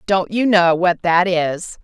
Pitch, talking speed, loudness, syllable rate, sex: 180 Hz, 195 wpm, -16 LUFS, 3.6 syllables/s, female